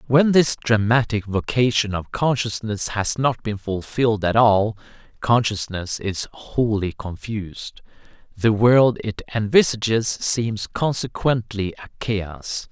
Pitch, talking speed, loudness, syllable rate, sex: 110 Hz, 115 wpm, -21 LUFS, 3.9 syllables/s, male